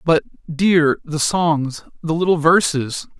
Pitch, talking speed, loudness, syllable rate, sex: 160 Hz, 95 wpm, -18 LUFS, 3.6 syllables/s, male